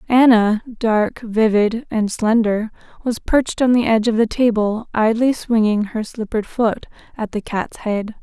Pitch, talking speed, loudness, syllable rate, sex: 225 Hz, 160 wpm, -18 LUFS, 4.4 syllables/s, female